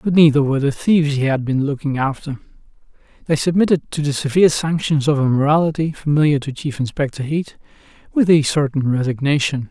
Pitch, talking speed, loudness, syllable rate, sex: 145 Hz, 175 wpm, -18 LUFS, 6.0 syllables/s, male